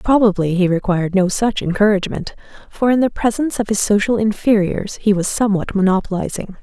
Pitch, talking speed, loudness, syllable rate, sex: 205 Hz, 165 wpm, -17 LUFS, 6.0 syllables/s, female